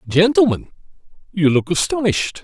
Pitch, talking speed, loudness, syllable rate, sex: 170 Hz, 100 wpm, -17 LUFS, 5.4 syllables/s, male